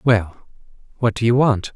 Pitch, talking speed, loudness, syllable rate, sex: 115 Hz, 170 wpm, -18 LUFS, 4.4 syllables/s, male